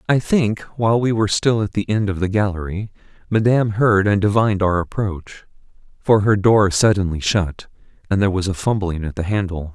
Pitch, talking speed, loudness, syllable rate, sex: 100 Hz, 190 wpm, -18 LUFS, 5.4 syllables/s, male